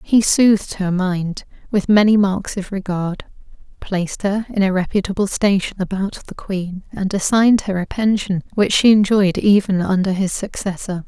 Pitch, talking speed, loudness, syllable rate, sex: 195 Hz, 165 wpm, -18 LUFS, 4.7 syllables/s, female